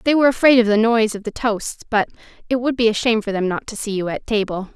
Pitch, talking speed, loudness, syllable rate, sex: 220 Hz, 290 wpm, -19 LUFS, 6.7 syllables/s, female